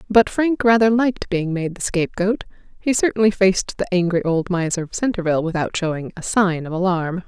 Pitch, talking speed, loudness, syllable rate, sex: 190 Hz, 190 wpm, -20 LUFS, 5.7 syllables/s, female